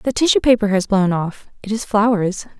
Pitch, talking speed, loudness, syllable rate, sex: 215 Hz, 210 wpm, -17 LUFS, 5.2 syllables/s, female